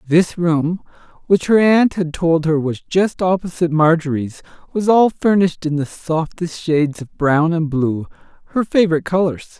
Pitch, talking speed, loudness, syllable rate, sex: 165 Hz, 150 wpm, -17 LUFS, 4.7 syllables/s, male